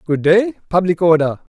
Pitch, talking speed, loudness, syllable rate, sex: 165 Hz, 150 wpm, -15 LUFS, 4.8 syllables/s, male